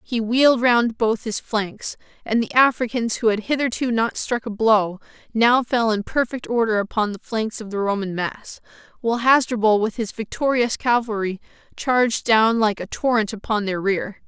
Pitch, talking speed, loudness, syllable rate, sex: 225 Hz, 175 wpm, -21 LUFS, 4.8 syllables/s, female